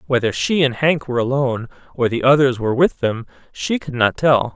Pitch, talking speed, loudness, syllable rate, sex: 125 Hz, 210 wpm, -18 LUFS, 5.7 syllables/s, male